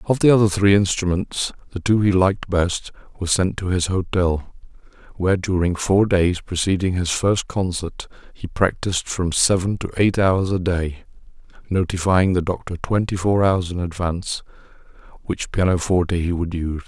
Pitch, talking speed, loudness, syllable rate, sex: 95 Hz, 160 wpm, -20 LUFS, 5.0 syllables/s, male